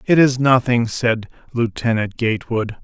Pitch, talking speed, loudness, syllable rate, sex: 120 Hz, 125 wpm, -18 LUFS, 4.6 syllables/s, male